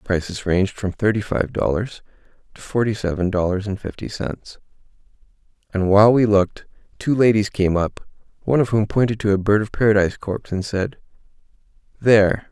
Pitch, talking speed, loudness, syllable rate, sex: 100 Hz, 170 wpm, -20 LUFS, 5.8 syllables/s, male